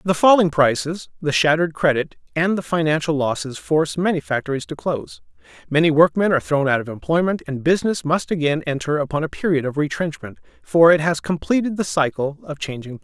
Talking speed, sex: 190 wpm, male